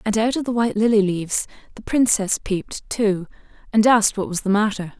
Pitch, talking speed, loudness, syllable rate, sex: 210 Hz, 205 wpm, -20 LUFS, 5.5 syllables/s, female